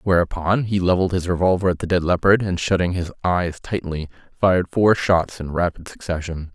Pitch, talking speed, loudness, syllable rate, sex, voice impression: 90 Hz, 185 wpm, -20 LUFS, 5.5 syllables/s, male, masculine, middle-aged, tensed, powerful, hard, slightly soft, slightly fluent, raspy, cool, intellectual, slightly calm, mature, slightly reassuring, wild, slightly strict